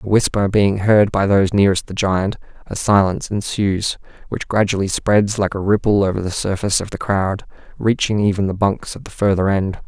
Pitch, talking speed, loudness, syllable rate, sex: 100 Hz, 195 wpm, -18 LUFS, 5.4 syllables/s, male